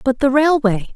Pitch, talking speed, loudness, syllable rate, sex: 260 Hz, 190 wpm, -16 LUFS, 4.9 syllables/s, female